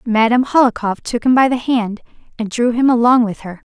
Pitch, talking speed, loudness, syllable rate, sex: 235 Hz, 225 wpm, -15 LUFS, 6.0 syllables/s, female